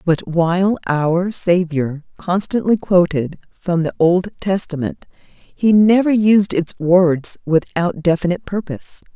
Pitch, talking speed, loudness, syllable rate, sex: 175 Hz, 120 wpm, -17 LUFS, 3.9 syllables/s, female